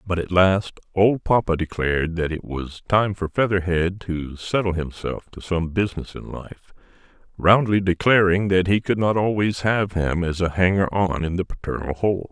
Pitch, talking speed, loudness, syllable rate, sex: 90 Hz, 180 wpm, -21 LUFS, 4.7 syllables/s, male